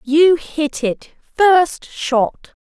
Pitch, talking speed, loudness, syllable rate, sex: 305 Hz, 115 wpm, -16 LUFS, 2.3 syllables/s, female